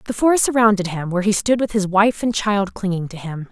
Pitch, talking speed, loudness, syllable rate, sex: 205 Hz, 255 wpm, -18 LUFS, 5.7 syllables/s, female